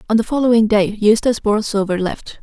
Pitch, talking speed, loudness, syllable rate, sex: 215 Hz, 175 wpm, -16 LUFS, 5.9 syllables/s, female